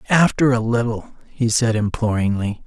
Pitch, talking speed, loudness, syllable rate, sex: 115 Hz, 135 wpm, -19 LUFS, 4.8 syllables/s, male